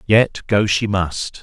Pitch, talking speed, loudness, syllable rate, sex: 100 Hz, 170 wpm, -18 LUFS, 3.2 syllables/s, male